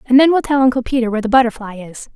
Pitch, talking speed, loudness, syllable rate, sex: 245 Hz, 280 wpm, -14 LUFS, 7.4 syllables/s, female